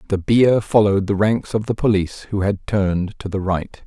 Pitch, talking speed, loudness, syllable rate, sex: 100 Hz, 220 wpm, -19 LUFS, 5.3 syllables/s, male